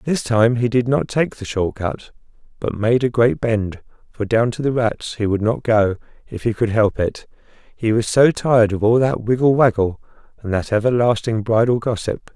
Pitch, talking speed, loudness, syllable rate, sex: 115 Hz, 205 wpm, -18 LUFS, 4.8 syllables/s, male